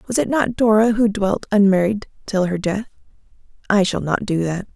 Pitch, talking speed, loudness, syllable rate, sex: 200 Hz, 190 wpm, -19 LUFS, 5.1 syllables/s, female